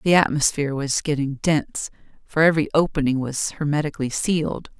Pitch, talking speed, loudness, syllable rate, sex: 150 Hz, 140 wpm, -22 LUFS, 5.9 syllables/s, female